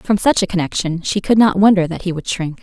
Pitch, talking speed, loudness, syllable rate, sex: 185 Hz, 275 wpm, -16 LUFS, 5.8 syllables/s, female